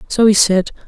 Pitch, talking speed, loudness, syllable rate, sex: 200 Hz, 205 wpm, -13 LUFS, 5.3 syllables/s, female